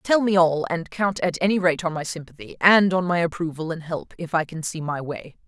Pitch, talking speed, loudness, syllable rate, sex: 170 Hz, 250 wpm, -22 LUFS, 5.3 syllables/s, female